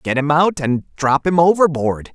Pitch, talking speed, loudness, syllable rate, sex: 150 Hz, 195 wpm, -16 LUFS, 4.3 syllables/s, male